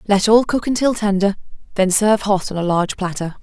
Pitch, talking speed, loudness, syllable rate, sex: 200 Hz, 210 wpm, -17 LUFS, 6.0 syllables/s, female